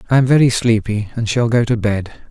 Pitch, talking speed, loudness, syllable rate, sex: 115 Hz, 235 wpm, -16 LUFS, 5.8 syllables/s, male